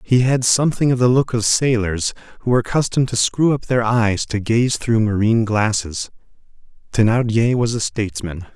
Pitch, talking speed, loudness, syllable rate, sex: 115 Hz, 175 wpm, -18 LUFS, 5.4 syllables/s, male